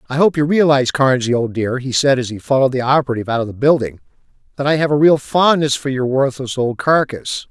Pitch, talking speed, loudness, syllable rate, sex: 135 Hz, 230 wpm, -16 LUFS, 6.2 syllables/s, male